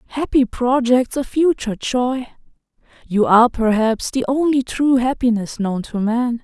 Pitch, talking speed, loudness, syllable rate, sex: 245 Hz, 140 wpm, -18 LUFS, 4.4 syllables/s, female